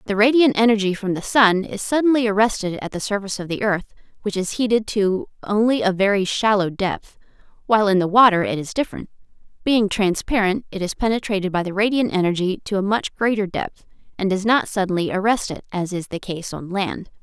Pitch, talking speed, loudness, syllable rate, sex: 200 Hz, 200 wpm, -20 LUFS, 5.7 syllables/s, female